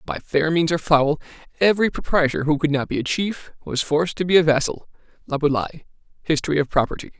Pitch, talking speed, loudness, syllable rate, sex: 155 Hz, 190 wpm, -21 LUFS, 5.9 syllables/s, male